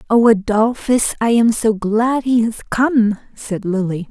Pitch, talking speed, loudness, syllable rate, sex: 220 Hz, 160 wpm, -16 LUFS, 3.6 syllables/s, female